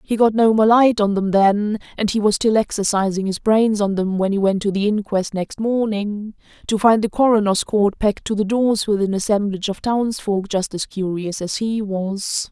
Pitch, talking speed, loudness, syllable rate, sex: 205 Hz, 210 wpm, -19 LUFS, 4.9 syllables/s, female